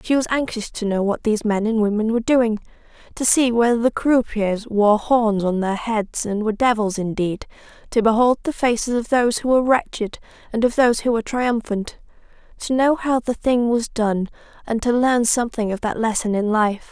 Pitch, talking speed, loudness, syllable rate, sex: 225 Hz, 190 wpm, -20 LUFS, 5.3 syllables/s, female